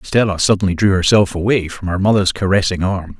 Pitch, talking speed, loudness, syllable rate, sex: 95 Hz, 190 wpm, -15 LUFS, 6.2 syllables/s, male